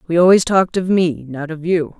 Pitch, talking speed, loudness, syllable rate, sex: 170 Hz, 240 wpm, -16 LUFS, 5.5 syllables/s, female